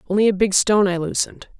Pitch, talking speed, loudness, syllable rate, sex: 195 Hz, 225 wpm, -19 LUFS, 7.5 syllables/s, female